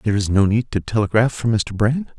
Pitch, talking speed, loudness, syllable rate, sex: 110 Hz, 245 wpm, -19 LUFS, 6.2 syllables/s, male